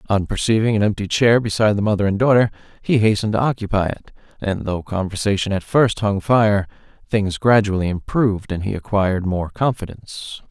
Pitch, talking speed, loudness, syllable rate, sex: 105 Hz, 170 wpm, -19 LUFS, 5.7 syllables/s, male